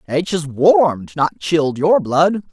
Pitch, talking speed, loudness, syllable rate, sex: 155 Hz, 165 wpm, -16 LUFS, 4.4 syllables/s, male